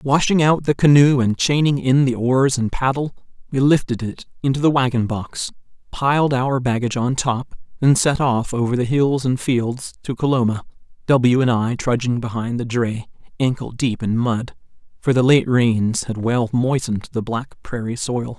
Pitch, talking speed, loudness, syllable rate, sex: 125 Hz, 180 wpm, -19 LUFS, 4.7 syllables/s, male